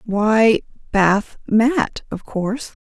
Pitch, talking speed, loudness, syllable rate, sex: 220 Hz, 85 wpm, -18 LUFS, 2.8 syllables/s, female